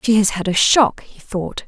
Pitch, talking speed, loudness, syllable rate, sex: 205 Hz, 250 wpm, -16 LUFS, 4.6 syllables/s, female